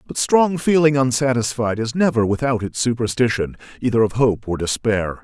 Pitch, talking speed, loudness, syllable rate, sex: 120 Hz, 160 wpm, -19 LUFS, 5.2 syllables/s, male